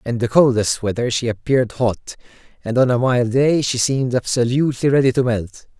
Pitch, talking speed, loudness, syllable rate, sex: 120 Hz, 185 wpm, -18 LUFS, 5.5 syllables/s, male